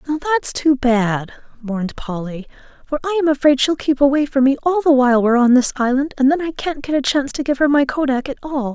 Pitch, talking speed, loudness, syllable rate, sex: 270 Hz, 240 wpm, -17 LUFS, 5.9 syllables/s, female